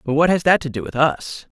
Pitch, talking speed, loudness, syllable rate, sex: 150 Hz, 300 wpm, -18 LUFS, 5.7 syllables/s, male